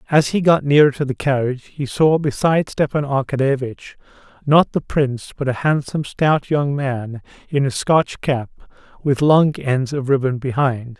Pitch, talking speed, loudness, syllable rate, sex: 140 Hz, 170 wpm, -18 LUFS, 4.8 syllables/s, male